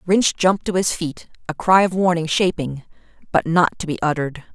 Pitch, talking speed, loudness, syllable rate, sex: 170 Hz, 200 wpm, -19 LUFS, 5.6 syllables/s, female